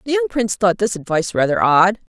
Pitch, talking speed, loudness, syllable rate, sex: 205 Hz, 220 wpm, -17 LUFS, 6.7 syllables/s, female